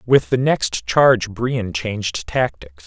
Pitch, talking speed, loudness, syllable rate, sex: 110 Hz, 145 wpm, -19 LUFS, 3.7 syllables/s, male